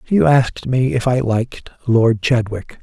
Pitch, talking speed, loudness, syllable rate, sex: 120 Hz, 170 wpm, -16 LUFS, 4.5 syllables/s, male